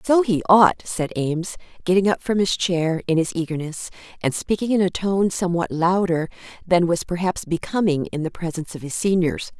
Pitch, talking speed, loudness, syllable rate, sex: 180 Hz, 190 wpm, -21 LUFS, 5.3 syllables/s, female